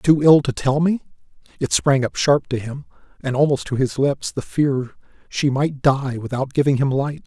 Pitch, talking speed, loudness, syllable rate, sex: 140 Hz, 205 wpm, -20 LUFS, 4.6 syllables/s, male